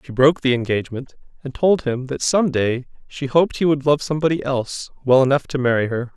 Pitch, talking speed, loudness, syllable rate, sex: 135 Hz, 215 wpm, -19 LUFS, 6.1 syllables/s, male